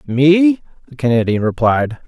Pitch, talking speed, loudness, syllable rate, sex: 135 Hz, 115 wpm, -15 LUFS, 4.4 syllables/s, male